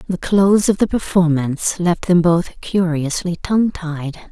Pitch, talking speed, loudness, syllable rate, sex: 175 Hz, 155 wpm, -17 LUFS, 4.4 syllables/s, female